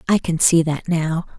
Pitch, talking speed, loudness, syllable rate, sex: 165 Hz, 215 wpm, -18 LUFS, 4.6 syllables/s, female